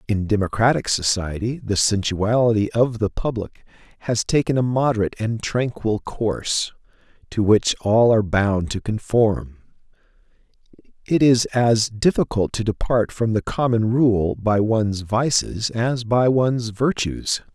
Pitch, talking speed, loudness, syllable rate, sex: 110 Hz, 135 wpm, -20 LUFS, 4.3 syllables/s, male